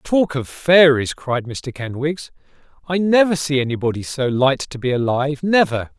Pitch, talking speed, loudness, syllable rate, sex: 140 Hz, 160 wpm, -18 LUFS, 4.6 syllables/s, male